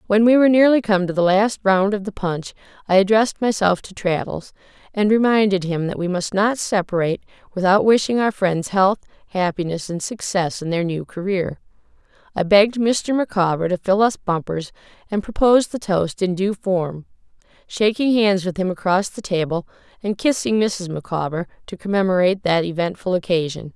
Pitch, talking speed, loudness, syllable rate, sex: 195 Hz, 170 wpm, -19 LUFS, 5.3 syllables/s, female